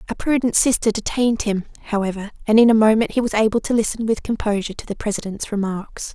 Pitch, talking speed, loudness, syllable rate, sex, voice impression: 215 Hz, 205 wpm, -20 LUFS, 6.5 syllables/s, female, feminine, young, slightly relaxed, slightly bright, soft, fluent, raspy, slightly cute, refreshing, friendly, elegant, lively, kind, slightly modest